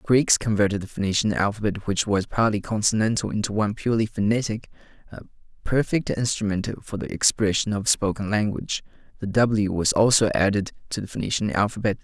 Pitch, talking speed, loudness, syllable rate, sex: 105 Hz, 155 wpm, -23 LUFS, 6.0 syllables/s, male